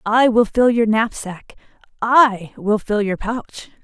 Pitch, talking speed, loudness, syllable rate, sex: 220 Hz, 140 wpm, -17 LUFS, 3.9 syllables/s, female